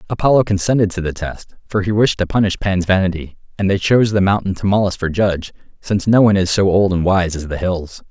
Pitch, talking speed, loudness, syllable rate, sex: 95 Hz, 235 wpm, -16 LUFS, 6.2 syllables/s, male